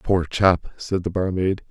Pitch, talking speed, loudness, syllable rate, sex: 90 Hz, 175 wpm, -22 LUFS, 4.1 syllables/s, male